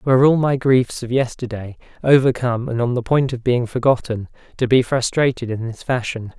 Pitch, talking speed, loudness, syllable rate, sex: 125 Hz, 190 wpm, -19 LUFS, 5.4 syllables/s, male